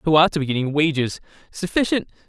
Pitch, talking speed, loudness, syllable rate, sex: 160 Hz, 160 wpm, -21 LUFS, 6.4 syllables/s, male